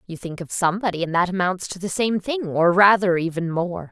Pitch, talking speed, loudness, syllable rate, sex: 185 Hz, 230 wpm, -21 LUFS, 5.5 syllables/s, female